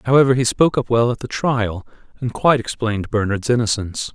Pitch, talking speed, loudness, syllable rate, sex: 120 Hz, 190 wpm, -19 LUFS, 6.3 syllables/s, male